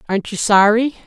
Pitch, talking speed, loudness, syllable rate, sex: 215 Hz, 170 wpm, -15 LUFS, 6.4 syllables/s, female